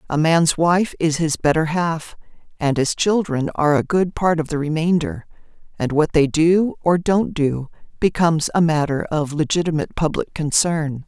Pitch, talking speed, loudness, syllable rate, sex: 160 Hz, 170 wpm, -19 LUFS, 4.7 syllables/s, female